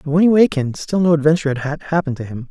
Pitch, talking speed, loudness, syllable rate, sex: 155 Hz, 265 wpm, -17 LUFS, 8.0 syllables/s, male